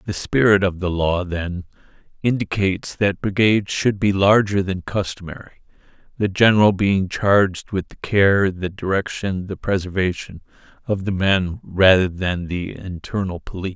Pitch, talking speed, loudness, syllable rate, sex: 95 Hz, 145 wpm, -19 LUFS, 4.7 syllables/s, male